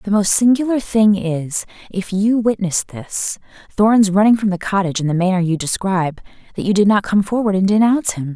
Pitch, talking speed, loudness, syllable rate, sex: 200 Hz, 200 wpm, -17 LUFS, 5.6 syllables/s, female